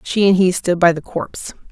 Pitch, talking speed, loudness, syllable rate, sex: 180 Hz, 245 wpm, -16 LUFS, 5.4 syllables/s, female